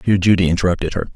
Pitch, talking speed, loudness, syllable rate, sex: 90 Hz, 205 wpm, -17 LUFS, 8.9 syllables/s, male